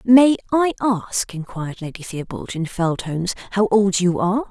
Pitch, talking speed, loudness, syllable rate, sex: 200 Hz, 175 wpm, -20 LUFS, 4.8 syllables/s, female